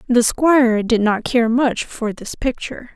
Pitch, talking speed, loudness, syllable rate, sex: 240 Hz, 185 wpm, -17 LUFS, 4.4 syllables/s, female